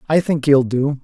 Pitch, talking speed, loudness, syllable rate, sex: 140 Hz, 235 wpm, -16 LUFS, 4.7 syllables/s, male